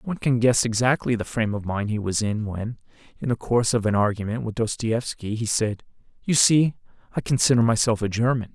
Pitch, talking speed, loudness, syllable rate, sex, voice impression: 115 Hz, 205 wpm, -23 LUFS, 5.7 syllables/s, male, masculine, adult-like, slightly tensed, soft, raspy, cool, friendly, reassuring, wild, lively, slightly kind